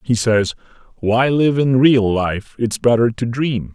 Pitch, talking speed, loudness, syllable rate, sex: 120 Hz, 175 wpm, -17 LUFS, 3.8 syllables/s, male